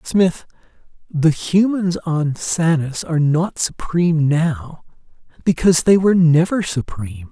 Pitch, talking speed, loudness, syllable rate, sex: 165 Hz, 115 wpm, -17 LUFS, 4.2 syllables/s, male